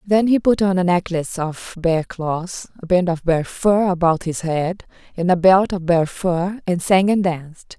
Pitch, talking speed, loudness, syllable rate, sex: 180 Hz, 210 wpm, -19 LUFS, 4.3 syllables/s, female